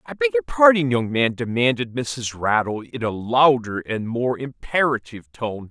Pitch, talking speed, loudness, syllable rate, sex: 130 Hz, 170 wpm, -21 LUFS, 4.5 syllables/s, male